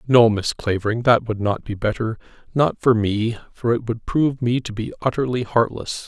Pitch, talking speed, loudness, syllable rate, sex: 115 Hz, 190 wpm, -21 LUFS, 5.1 syllables/s, male